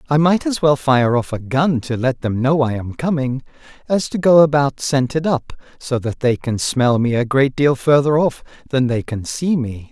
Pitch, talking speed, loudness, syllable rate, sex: 135 Hz, 225 wpm, -17 LUFS, 4.7 syllables/s, male